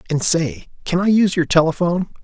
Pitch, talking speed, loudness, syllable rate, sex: 165 Hz, 190 wpm, -18 LUFS, 6.2 syllables/s, male